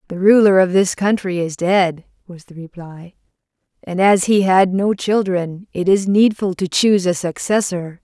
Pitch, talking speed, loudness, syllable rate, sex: 185 Hz, 170 wpm, -16 LUFS, 4.5 syllables/s, female